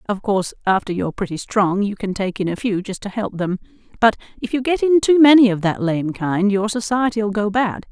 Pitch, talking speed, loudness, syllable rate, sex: 210 Hz, 235 wpm, -18 LUFS, 5.5 syllables/s, female